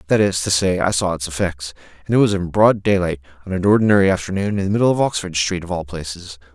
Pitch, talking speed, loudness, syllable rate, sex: 90 Hz, 245 wpm, -18 LUFS, 6.6 syllables/s, male